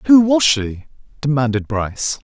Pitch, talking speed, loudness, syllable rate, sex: 145 Hz, 130 wpm, -17 LUFS, 4.6 syllables/s, male